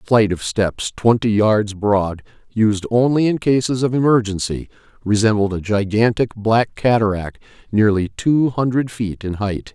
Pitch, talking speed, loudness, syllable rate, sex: 110 Hz, 150 wpm, -18 LUFS, 4.4 syllables/s, male